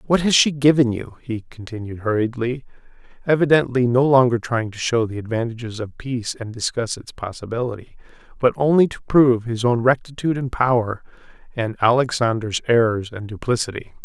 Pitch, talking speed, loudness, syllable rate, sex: 120 Hz, 155 wpm, -20 LUFS, 5.6 syllables/s, male